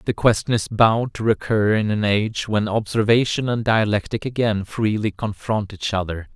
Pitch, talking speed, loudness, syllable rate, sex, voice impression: 105 Hz, 170 wpm, -20 LUFS, 4.9 syllables/s, male, masculine, adult-like, cool, sincere, calm, slightly friendly, slightly sweet